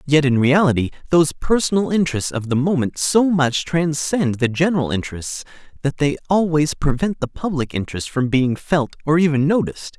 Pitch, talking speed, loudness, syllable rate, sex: 150 Hz, 170 wpm, -19 LUFS, 5.4 syllables/s, male